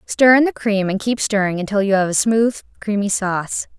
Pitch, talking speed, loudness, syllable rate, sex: 210 Hz, 220 wpm, -17 LUFS, 5.2 syllables/s, female